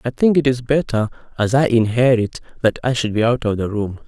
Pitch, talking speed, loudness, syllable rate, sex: 120 Hz, 235 wpm, -18 LUFS, 5.6 syllables/s, male